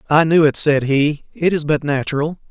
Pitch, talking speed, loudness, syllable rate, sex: 150 Hz, 215 wpm, -17 LUFS, 5.2 syllables/s, male